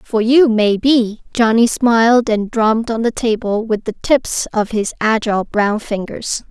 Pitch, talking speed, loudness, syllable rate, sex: 225 Hz, 175 wpm, -15 LUFS, 4.3 syllables/s, female